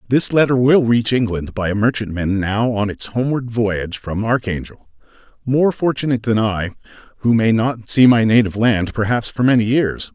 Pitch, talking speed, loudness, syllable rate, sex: 115 Hz, 175 wpm, -17 LUFS, 5.2 syllables/s, male